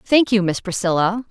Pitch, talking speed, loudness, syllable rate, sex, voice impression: 200 Hz, 185 wpm, -18 LUFS, 5.1 syllables/s, female, feminine, adult-like, tensed, powerful, clear, fluent, intellectual, elegant, lively, slightly strict, sharp